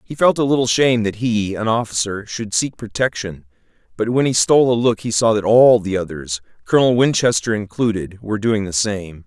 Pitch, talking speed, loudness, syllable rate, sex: 110 Hz, 200 wpm, -17 LUFS, 5.4 syllables/s, male